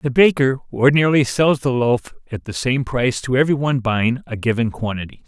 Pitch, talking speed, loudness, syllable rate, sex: 125 Hz, 195 wpm, -18 LUFS, 5.9 syllables/s, male